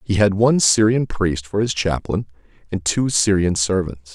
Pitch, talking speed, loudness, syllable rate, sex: 100 Hz, 175 wpm, -18 LUFS, 4.7 syllables/s, male